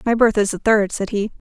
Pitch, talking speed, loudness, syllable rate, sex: 210 Hz, 285 wpm, -18 LUFS, 5.7 syllables/s, female